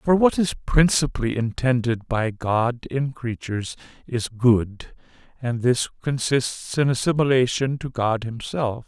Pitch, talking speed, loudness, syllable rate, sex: 125 Hz, 130 wpm, -22 LUFS, 4.1 syllables/s, male